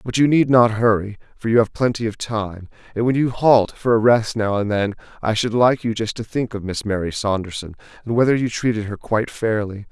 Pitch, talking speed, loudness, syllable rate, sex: 110 Hz, 235 wpm, -19 LUFS, 5.5 syllables/s, male